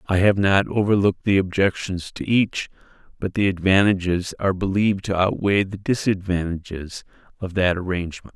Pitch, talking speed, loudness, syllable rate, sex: 95 Hz, 145 wpm, -21 LUFS, 5.3 syllables/s, male